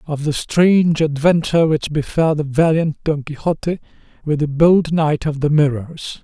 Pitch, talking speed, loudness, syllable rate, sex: 155 Hz, 165 wpm, -17 LUFS, 4.6 syllables/s, male